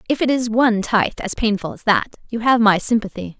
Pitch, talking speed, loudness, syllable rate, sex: 220 Hz, 230 wpm, -18 LUFS, 6.0 syllables/s, female